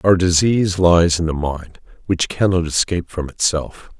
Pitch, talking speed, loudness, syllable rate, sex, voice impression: 85 Hz, 165 wpm, -17 LUFS, 4.8 syllables/s, male, very adult-like, very middle-aged, very thick, tensed, very powerful, slightly bright, very soft, slightly muffled, fluent, slightly raspy, very cool, very intellectual, slightly refreshing, very sincere, very calm, very mature, very friendly, very reassuring, very unique, elegant, very wild, sweet, lively, very kind, slightly modest